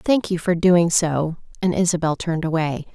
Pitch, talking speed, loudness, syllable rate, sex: 170 Hz, 185 wpm, -20 LUFS, 5.0 syllables/s, female